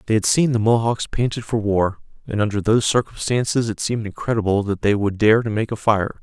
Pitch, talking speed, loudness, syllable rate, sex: 110 Hz, 220 wpm, -20 LUFS, 6.0 syllables/s, male